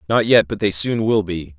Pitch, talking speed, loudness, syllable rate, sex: 100 Hz, 265 wpm, -17 LUFS, 5.0 syllables/s, male